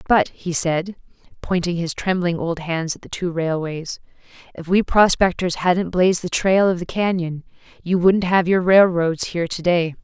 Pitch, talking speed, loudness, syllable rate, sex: 175 Hz, 180 wpm, -19 LUFS, 4.7 syllables/s, female